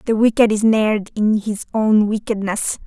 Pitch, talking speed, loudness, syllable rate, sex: 215 Hz, 170 wpm, -17 LUFS, 4.7 syllables/s, female